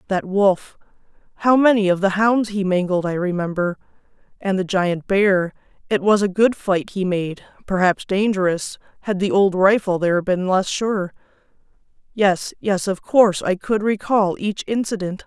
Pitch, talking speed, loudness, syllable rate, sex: 195 Hz, 155 wpm, -19 LUFS, 4.5 syllables/s, female